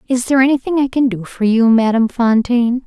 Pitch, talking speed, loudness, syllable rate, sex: 245 Hz, 210 wpm, -14 LUFS, 6.3 syllables/s, female